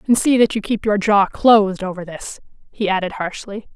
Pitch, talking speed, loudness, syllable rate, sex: 205 Hz, 210 wpm, -17 LUFS, 5.3 syllables/s, female